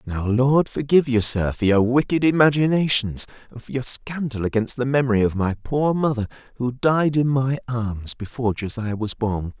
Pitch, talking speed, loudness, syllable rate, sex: 125 Hz, 180 wpm, -21 LUFS, 5.0 syllables/s, male